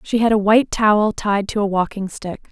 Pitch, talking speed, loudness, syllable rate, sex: 205 Hz, 240 wpm, -18 LUFS, 5.4 syllables/s, female